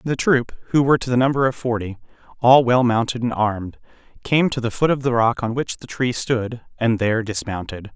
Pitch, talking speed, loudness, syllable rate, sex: 120 Hz, 220 wpm, -20 LUFS, 5.6 syllables/s, male